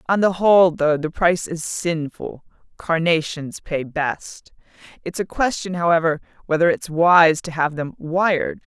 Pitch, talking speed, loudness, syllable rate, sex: 165 Hz, 145 wpm, -19 LUFS, 4.3 syllables/s, female